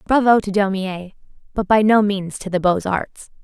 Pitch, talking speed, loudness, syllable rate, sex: 200 Hz, 190 wpm, -18 LUFS, 4.8 syllables/s, female